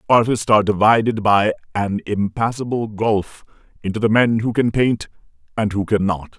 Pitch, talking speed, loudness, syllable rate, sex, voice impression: 105 Hz, 150 wpm, -18 LUFS, 5.0 syllables/s, male, masculine, adult-like, thick, tensed, powerful, slightly hard, clear, fluent, cool, intellectual, sincere, wild, lively, slightly strict